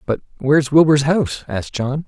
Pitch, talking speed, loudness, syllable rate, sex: 145 Hz, 175 wpm, -17 LUFS, 5.8 syllables/s, male